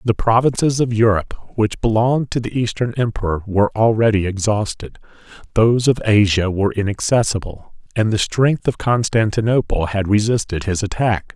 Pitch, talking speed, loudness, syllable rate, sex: 110 Hz, 145 wpm, -18 LUFS, 5.3 syllables/s, male